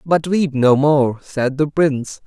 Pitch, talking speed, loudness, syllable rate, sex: 145 Hz, 185 wpm, -17 LUFS, 3.9 syllables/s, male